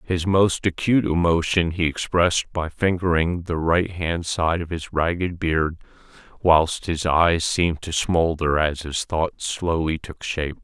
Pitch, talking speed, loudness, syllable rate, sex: 85 Hz, 150 wpm, -22 LUFS, 4.2 syllables/s, male